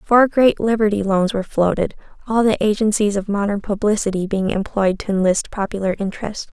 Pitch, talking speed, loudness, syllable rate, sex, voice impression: 205 Hz, 165 wpm, -19 LUFS, 5.6 syllables/s, female, feminine, slightly adult-like, slightly soft, slightly fluent, cute, slightly refreshing, slightly calm, friendly